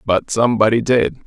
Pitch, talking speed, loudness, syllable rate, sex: 110 Hz, 145 wpm, -16 LUFS, 5.2 syllables/s, male